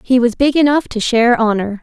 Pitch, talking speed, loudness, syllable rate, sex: 245 Hz, 230 wpm, -14 LUFS, 5.8 syllables/s, female